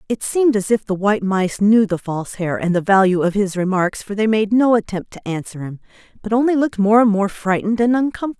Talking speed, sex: 245 wpm, female